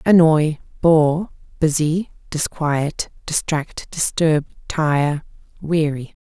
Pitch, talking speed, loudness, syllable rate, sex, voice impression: 155 Hz, 75 wpm, -19 LUFS, 3.0 syllables/s, female, feminine, adult-like, calm, slightly sweet, slightly kind